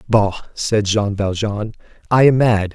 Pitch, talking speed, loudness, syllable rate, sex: 105 Hz, 155 wpm, -17 LUFS, 3.8 syllables/s, male